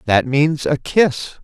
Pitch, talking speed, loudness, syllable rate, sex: 140 Hz, 165 wpm, -17 LUFS, 3.3 syllables/s, male